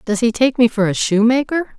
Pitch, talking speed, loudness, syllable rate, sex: 235 Hz, 235 wpm, -16 LUFS, 5.3 syllables/s, female